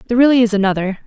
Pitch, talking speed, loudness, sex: 220 Hz, 225 wpm, -14 LUFS, female